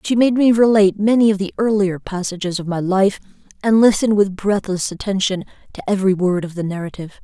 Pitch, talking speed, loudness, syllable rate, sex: 200 Hz, 190 wpm, -17 LUFS, 6.2 syllables/s, female